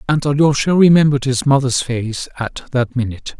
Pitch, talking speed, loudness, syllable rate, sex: 130 Hz, 160 wpm, -16 LUFS, 5.5 syllables/s, male